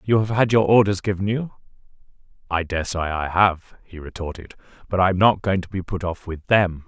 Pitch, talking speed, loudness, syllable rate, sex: 95 Hz, 210 wpm, -21 LUFS, 5.5 syllables/s, male